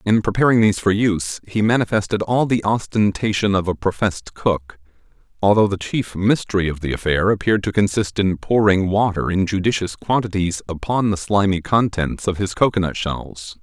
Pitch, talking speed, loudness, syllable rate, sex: 100 Hz, 165 wpm, -19 LUFS, 5.3 syllables/s, male